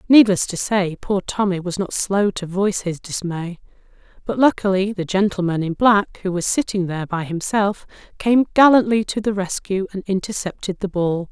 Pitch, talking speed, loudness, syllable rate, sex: 195 Hz, 175 wpm, -19 LUFS, 5.0 syllables/s, female